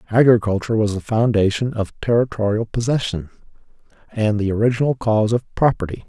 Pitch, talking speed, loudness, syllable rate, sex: 110 Hz, 130 wpm, -19 LUFS, 5.9 syllables/s, male